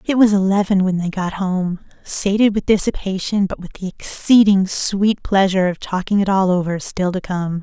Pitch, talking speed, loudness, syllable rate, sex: 190 Hz, 190 wpm, -17 LUFS, 5.0 syllables/s, female